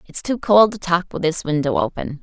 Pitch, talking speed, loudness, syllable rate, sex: 175 Hz, 240 wpm, -19 LUFS, 5.3 syllables/s, female